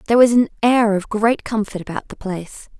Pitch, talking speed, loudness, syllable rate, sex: 215 Hz, 215 wpm, -18 LUFS, 5.8 syllables/s, female